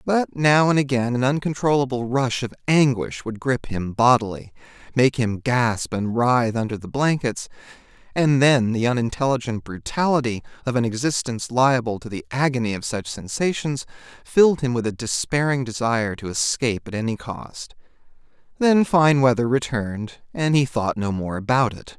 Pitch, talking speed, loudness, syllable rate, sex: 125 Hz, 160 wpm, -21 LUFS, 5.0 syllables/s, male